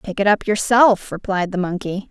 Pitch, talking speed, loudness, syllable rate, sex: 195 Hz, 200 wpm, -18 LUFS, 5.0 syllables/s, female